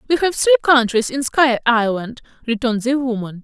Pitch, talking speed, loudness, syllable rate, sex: 250 Hz, 175 wpm, -17 LUFS, 5.3 syllables/s, female